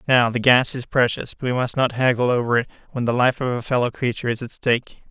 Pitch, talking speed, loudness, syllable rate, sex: 125 Hz, 260 wpm, -20 LUFS, 6.5 syllables/s, male